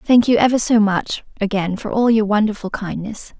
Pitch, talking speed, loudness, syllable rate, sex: 215 Hz, 195 wpm, -18 LUFS, 5.1 syllables/s, female